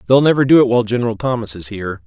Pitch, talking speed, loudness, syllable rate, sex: 115 Hz, 260 wpm, -15 LUFS, 8.1 syllables/s, male